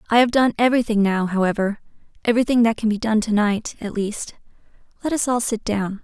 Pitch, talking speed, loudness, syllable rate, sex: 220 Hz, 190 wpm, -20 LUFS, 6.1 syllables/s, female